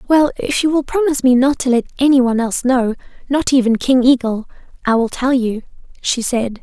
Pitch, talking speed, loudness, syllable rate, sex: 255 Hz, 210 wpm, -16 LUFS, 5.8 syllables/s, female